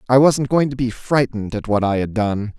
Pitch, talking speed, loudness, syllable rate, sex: 120 Hz, 255 wpm, -19 LUFS, 5.4 syllables/s, male